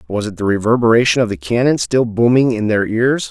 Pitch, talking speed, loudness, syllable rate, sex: 115 Hz, 220 wpm, -15 LUFS, 5.7 syllables/s, male